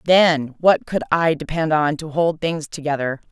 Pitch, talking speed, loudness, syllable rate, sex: 155 Hz, 180 wpm, -19 LUFS, 4.3 syllables/s, female